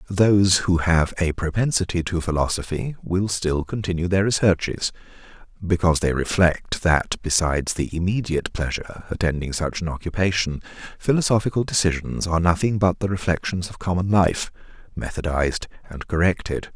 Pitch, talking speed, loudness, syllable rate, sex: 90 Hz, 130 wpm, -22 LUFS, 5.4 syllables/s, male